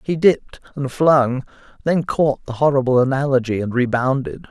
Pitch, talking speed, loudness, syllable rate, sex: 135 Hz, 145 wpm, -18 LUFS, 5.1 syllables/s, male